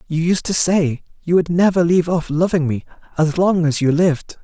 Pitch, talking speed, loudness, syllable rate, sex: 165 Hz, 215 wpm, -17 LUFS, 5.4 syllables/s, male